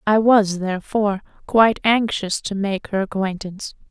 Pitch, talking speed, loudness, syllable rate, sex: 205 Hz, 140 wpm, -19 LUFS, 5.0 syllables/s, female